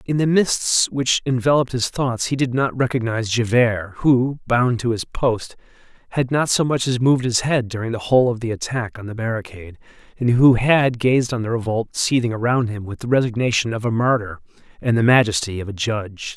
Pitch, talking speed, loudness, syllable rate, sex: 120 Hz, 205 wpm, -19 LUFS, 5.5 syllables/s, male